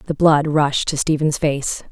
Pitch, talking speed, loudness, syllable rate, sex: 150 Hz, 190 wpm, -18 LUFS, 3.9 syllables/s, female